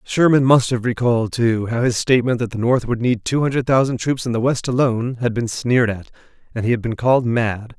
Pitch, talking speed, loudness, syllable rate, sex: 120 Hz, 240 wpm, -18 LUFS, 5.8 syllables/s, male